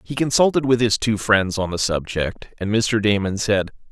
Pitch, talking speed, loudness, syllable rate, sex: 105 Hz, 200 wpm, -20 LUFS, 4.7 syllables/s, male